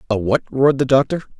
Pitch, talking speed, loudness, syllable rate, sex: 130 Hz, 215 wpm, -17 LUFS, 6.6 syllables/s, male